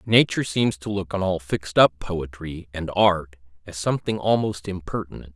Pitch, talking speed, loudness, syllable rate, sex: 90 Hz, 170 wpm, -23 LUFS, 5.3 syllables/s, male